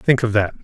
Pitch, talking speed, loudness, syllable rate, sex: 115 Hz, 285 wpm, -18 LUFS, 5.8 syllables/s, male